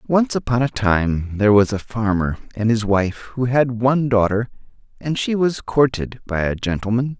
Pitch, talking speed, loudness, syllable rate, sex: 115 Hz, 185 wpm, -19 LUFS, 4.8 syllables/s, male